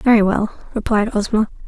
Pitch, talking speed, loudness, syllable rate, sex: 215 Hz, 145 wpm, -18 LUFS, 5.2 syllables/s, female